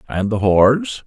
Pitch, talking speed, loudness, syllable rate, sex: 115 Hz, 170 wpm, -16 LUFS, 4.5 syllables/s, male